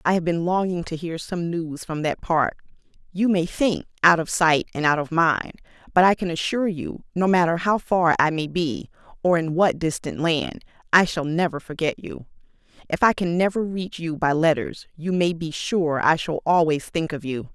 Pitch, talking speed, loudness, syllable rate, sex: 165 Hz, 210 wpm, -22 LUFS, 4.8 syllables/s, female